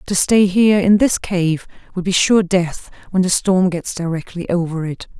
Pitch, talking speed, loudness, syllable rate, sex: 185 Hz, 195 wpm, -17 LUFS, 4.7 syllables/s, female